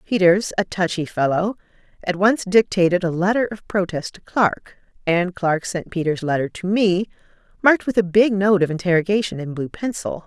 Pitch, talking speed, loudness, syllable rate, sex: 185 Hz, 175 wpm, -20 LUFS, 5.1 syllables/s, female